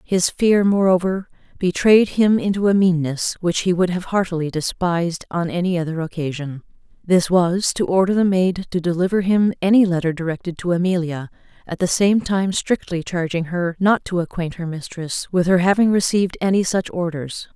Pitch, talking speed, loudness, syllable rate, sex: 180 Hz, 175 wpm, -19 LUFS, 5.1 syllables/s, female